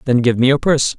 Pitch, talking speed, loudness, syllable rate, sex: 130 Hz, 305 wpm, -15 LUFS, 7.1 syllables/s, male